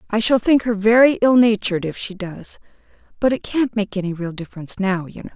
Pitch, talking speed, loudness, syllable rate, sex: 210 Hz, 225 wpm, -19 LUFS, 6.0 syllables/s, female